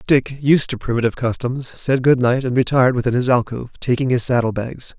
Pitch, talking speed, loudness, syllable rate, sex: 125 Hz, 205 wpm, -18 LUFS, 5.9 syllables/s, male